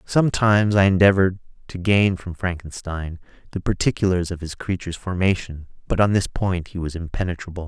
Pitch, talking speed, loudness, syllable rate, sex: 90 Hz, 155 wpm, -21 LUFS, 5.7 syllables/s, male